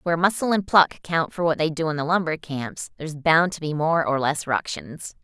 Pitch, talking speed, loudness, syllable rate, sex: 160 Hz, 240 wpm, -22 LUFS, 5.2 syllables/s, female